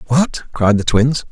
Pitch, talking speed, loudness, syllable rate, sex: 130 Hz, 180 wpm, -16 LUFS, 4.1 syllables/s, male